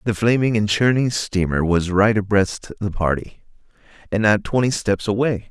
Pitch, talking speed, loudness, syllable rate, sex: 105 Hz, 165 wpm, -19 LUFS, 4.8 syllables/s, male